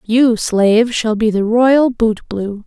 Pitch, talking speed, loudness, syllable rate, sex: 225 Hz, 160 wpm, -14 LUFS, 3.5 syllables/s, female